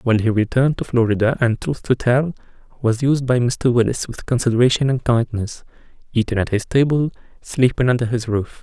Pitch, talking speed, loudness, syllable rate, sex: 120 Hz, 180 wpm, -19 LUFS, 5.5 syllables/s, male